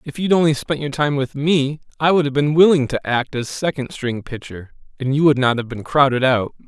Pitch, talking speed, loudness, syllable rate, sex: 140 Hz, 245 wpm, -18 LUFS, 5.3 syllables/s, male